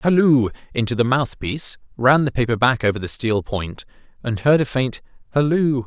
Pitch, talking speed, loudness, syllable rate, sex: 125 Hz, 175 wpm, -20 LUFS, 5.2 syllables/s, male